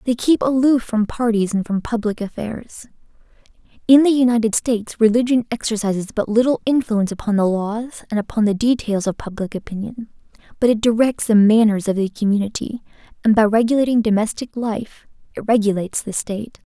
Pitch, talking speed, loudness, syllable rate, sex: 220 Hz, 160 wpm, -18 LUFS, 5.8 syllables/s, female